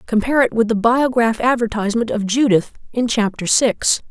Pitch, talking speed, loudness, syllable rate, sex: 230 Hz, 160 wpm, -17 LUFS, 5.3 syllables/s, female